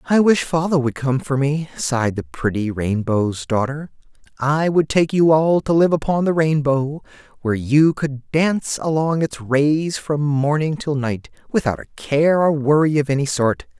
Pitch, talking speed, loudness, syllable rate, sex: 145 Hz, 180 wpm, -19 LUFS, 4.5 syllables/s, male